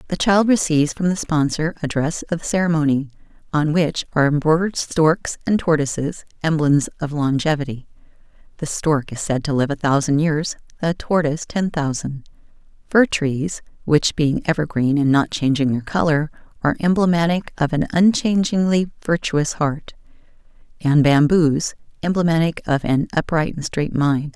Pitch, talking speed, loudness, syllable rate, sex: 155 Hz, 145 wpm, -19 LUFS, 1.9 syllables/s, female